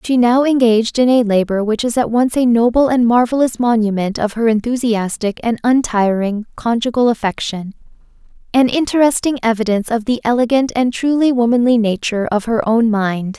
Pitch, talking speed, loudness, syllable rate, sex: 235 Hz, 160 wpm, -15 LUFS, 5.4 syllables/s, female